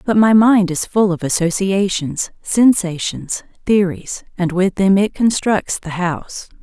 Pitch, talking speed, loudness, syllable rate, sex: 190 Hz, 145 wpm, -16 LUFS, 4.0 syllables/s, female